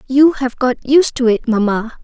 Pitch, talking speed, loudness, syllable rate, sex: 255 Hz, 205 wpm, -14 LUFS, 4.8 syllables/s, female